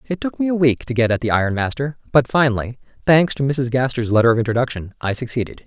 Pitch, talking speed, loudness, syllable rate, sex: 130 Hz, 235 wpm, -19 LUFS, 6.5 syllables/s, male